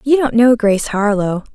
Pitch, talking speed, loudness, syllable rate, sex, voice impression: 230 Hz, 195 wpm, -14 LUFS, 5.9 syllables/s, female, very feminine, slightly adult-like, sincere, friendly, slightly kind